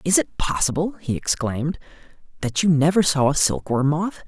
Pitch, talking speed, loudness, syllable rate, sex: 150 Hz, 170 wpm, -21 LUFS, 5.1 syllables/s, male